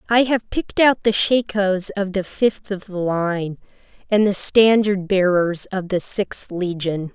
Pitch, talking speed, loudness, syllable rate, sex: 195 Hz, 170 wpm, -19 LUFS, 4.0 syllables/s, female